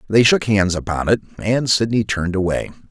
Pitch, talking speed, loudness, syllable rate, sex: 105 Hz, 185 wpm, -18 LUFS, 5.5 syllables/s, male